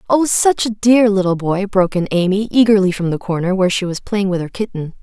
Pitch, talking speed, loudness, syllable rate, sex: 195 Hz, 240 wpm, -16 LUFS, 6.0 syllables/s, female